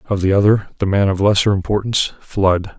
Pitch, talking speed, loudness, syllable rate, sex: 100 Hz, 150 wpm, -16 LUFS, 5.7 syllables/s, male